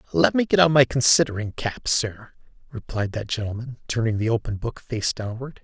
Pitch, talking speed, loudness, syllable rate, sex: 115 Hz, 180 wpm, -22 LUFS, 5.3 syllables/s, male